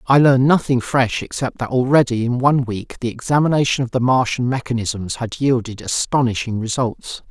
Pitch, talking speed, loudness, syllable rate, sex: 125 Hz, 165 wpm, -18 LUFS, 5.4 syllables/s, male